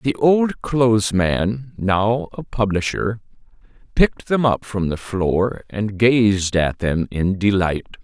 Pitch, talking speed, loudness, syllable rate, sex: 105 Hz, 140 wpm, -19 LUFS, 3.5 syllables/s, male